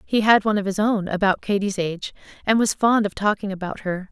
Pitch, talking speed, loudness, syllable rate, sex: 200 Hz, 235 wpm, -21 LUFS, 6.0 syllables/s, female